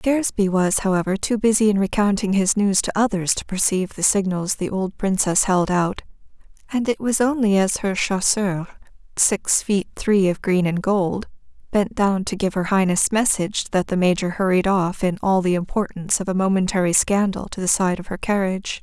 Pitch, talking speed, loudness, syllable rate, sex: 195 Hz, 190 wpm, -20 LUFS, 5.2 syllables/s, female